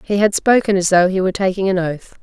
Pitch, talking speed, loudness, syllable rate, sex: 190 Hz, 270 wpm, -16 LUFS, 6.1 syllables/s, female